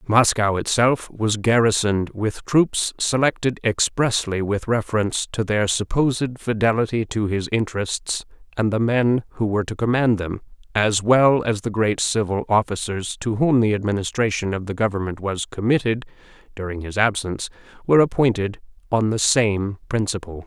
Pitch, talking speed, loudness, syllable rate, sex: 110 Hz, 145 wpm, -21 LUFS, 5.0 syllables/s, male